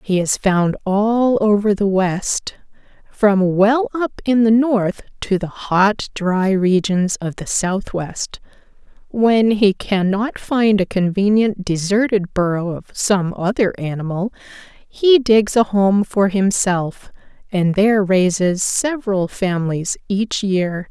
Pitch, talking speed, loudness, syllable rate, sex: 200 Hz, 130 wpm, -17 LUFS, 3.6 syllables/s, female